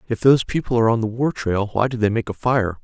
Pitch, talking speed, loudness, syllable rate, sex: 115 Hz, 295 wpm, -20 LUFS, 6.5 syllables/s, male